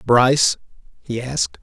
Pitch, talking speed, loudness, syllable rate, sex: 110 Hz, 110 wpm, -18 LUFS, 4.7 syllables/s, male